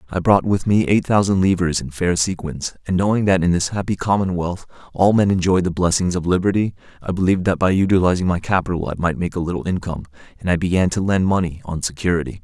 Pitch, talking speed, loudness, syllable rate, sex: 90 Hz, 215 wpm, -19 LUFS, 6.4 syllables/s, male